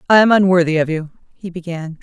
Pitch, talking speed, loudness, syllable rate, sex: 175 Hz, 205 wpm, -15 LUFS, 6.2 syllables/s, female